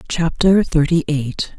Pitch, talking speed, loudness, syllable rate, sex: 160 Hz, 115 wpm, -17 LUFS, 3.6 syllables/s, female